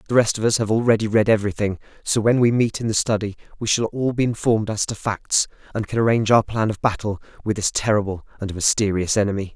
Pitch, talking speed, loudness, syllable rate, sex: 110 Hz, 225 wpm, -21 LUFS, 6.4 syllables/s, male